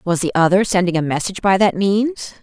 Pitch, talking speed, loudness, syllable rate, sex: 190 Hz, 225 wpm, -17 LUFS, 5.9 syllables/s, female